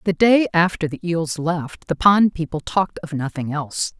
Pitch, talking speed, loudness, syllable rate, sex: 165 Hz, 195 wpm, -20 LUFS, 4.8 syllables/s, female